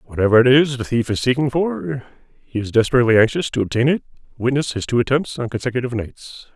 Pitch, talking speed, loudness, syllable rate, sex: 125 Hz, 190 wpm, -18 LUFS, 6.4 syllables/s, male